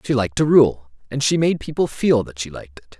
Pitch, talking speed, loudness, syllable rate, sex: 120 Hz, 260 wpm, -19 LUFS, 6.1 syllables/s, male